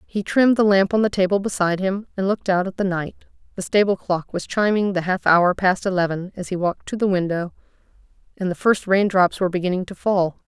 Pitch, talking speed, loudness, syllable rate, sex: 190 Hz, 230 wpm, -20 LUFS, 6.1 syllables/s, female